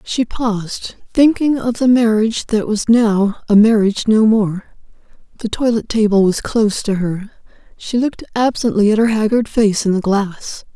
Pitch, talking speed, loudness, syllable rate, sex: 220 Hz, 165 wpm, -15 LUFS, 4.8 syllables/s, female